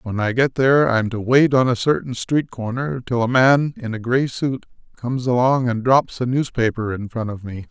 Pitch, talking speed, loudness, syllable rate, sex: 125 Hz, 225 wpm, -19 LUFS, 5.0 syllables/s, male